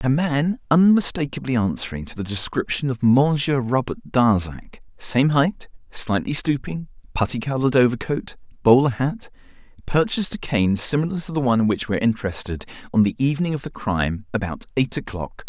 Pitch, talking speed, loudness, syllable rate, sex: 125 Hz, 150 wpm, -21 LUFS, 5.5 syllables/s, male